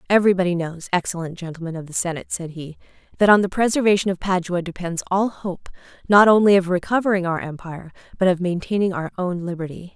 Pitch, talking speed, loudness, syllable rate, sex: 180 Hz, 180 wpm, -20 LUFS, 6.5 syllables/s, female